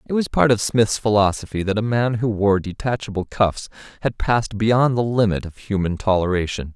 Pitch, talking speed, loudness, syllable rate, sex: 105 Hz, 185 wpm, -20 LUFS, 5.3 syllables/s, male